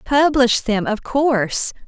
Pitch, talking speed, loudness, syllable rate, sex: 245 Hz, 130 wpm, -18 LUFS, 3.7 syllables/s, female